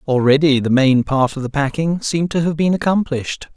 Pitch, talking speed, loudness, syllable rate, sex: 145 Hz, 200 wpm, -17 LUFS, 5.6 syllables/s, male